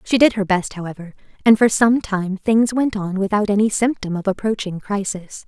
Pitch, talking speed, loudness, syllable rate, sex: 205 Hz, 195 wpm, -19 LUFS, 5.1 syllables/s, female